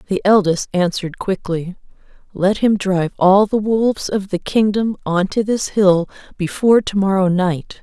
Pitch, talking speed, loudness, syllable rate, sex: 195 Hz, 160 wpm, -17 LUFS, 4.8 syllables/s, female